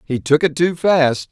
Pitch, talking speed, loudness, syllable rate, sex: 155 Hz, 230 wpm, -16 LUFS, 4.2 syllables/s, male